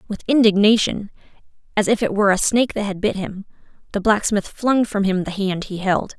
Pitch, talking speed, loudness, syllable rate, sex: 205 Hz, 205 wpm, -19 LUFS, 5.6 syllables/s, female